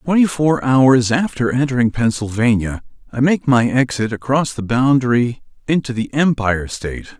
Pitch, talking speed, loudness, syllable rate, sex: 125 Hz, 140 wpm, -17 LUFS, 5.0 syllables/s, male